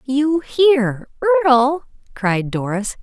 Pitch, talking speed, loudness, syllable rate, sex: 250 Hz, 100 wpm, -17 LUFS, 3.6 syllables/s, female